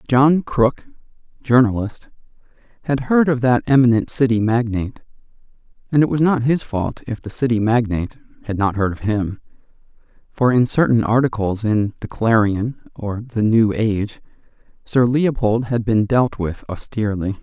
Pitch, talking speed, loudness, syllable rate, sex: 115 Hz, 150 wpm, -18 LUFS, 4.8 syllables/s, male